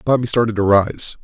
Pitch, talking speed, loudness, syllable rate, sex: 110 Hz, 195 wpm, -16 LUFS, 5.4 syllables/s, male